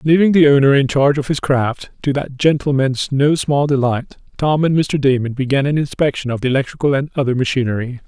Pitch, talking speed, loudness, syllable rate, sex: 140 Hz, 200 wpm, -16 LUFS, 5.8 syllables/s, male